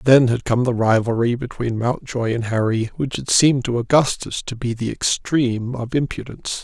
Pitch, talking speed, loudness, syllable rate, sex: 120 Hz, 180 wpm, -20 LUFS, 5.1 syllables/s, male